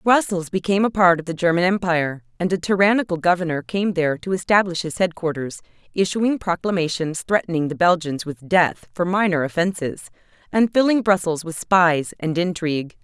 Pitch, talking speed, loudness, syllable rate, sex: 175 Hz, 160 wpm, -20 LUFS, 5.5 syllables/s, female